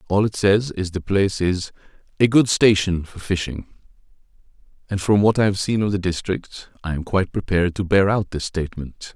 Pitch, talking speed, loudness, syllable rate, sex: 95 Hz, 195 wpm, -20 LUFS, 5.5 syllables/s, male